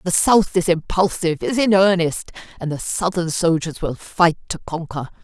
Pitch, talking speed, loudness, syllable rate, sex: 175 Hz, 170 wpm, -19 LUFS, 4.8 syllables/s, female